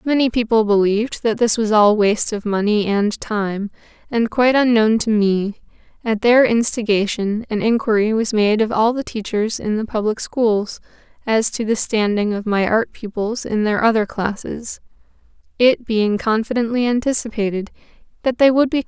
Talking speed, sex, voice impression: 180 wpm, female, feminine, slightly young, slightly powerful, slightly bright, soft, calm, friendly, reassuring, kind